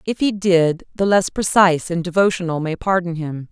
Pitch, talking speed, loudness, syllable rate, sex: 180 Hz, 190 wpm, -18 LUFS, 5.1 syllables/s, female